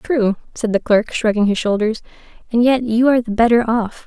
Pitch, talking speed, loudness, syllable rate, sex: 225 Hz, 205 wpm, -17 LUFS, 5.4 syllables/s, female